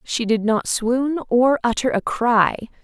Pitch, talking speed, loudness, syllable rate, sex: 240 Hz, 170 wpm, -19 LUFS, 3.8 syllables/s, female